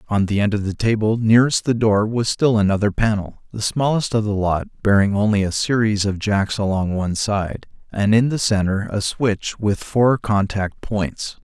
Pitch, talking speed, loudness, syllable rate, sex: 105 Hz, 195 wpm, -19 LUFS, 4.8 syllables/s, male